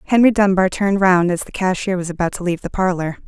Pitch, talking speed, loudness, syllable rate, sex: 185 Hz, 240 wpm, -17 LUFS, 6.6 syllables/s, female